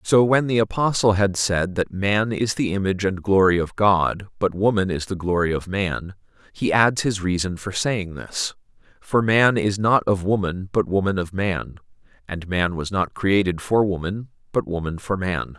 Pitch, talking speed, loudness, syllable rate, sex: 100 Hz, 190 wpm, -21 LUFS, 4.6 syllables/s, male